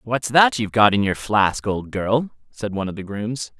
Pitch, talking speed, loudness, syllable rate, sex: 110 Hz, 235 wpm, -20 LUFS, 4.8 syllables/s, male